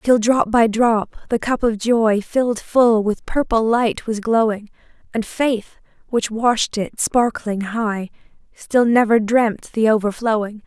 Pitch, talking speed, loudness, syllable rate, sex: 225 Hz, 150 wpm, -18 LUFS, 3.9 syllables/s, female